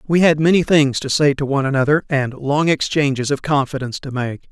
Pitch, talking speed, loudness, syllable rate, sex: 140 Hz, 215 wpm, -17 LUFS, 5.8 syllables/s, male